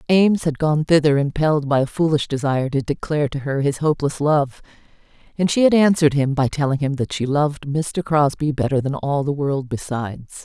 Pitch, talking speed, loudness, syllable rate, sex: 145 Hz, 200 wpm, -19 LUFS, 5.7 syllables/s, female